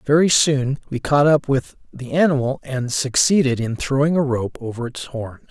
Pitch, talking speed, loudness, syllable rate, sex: 135 Hz, 185 wpm, -19 LUFS, 4.8 syllables/s, male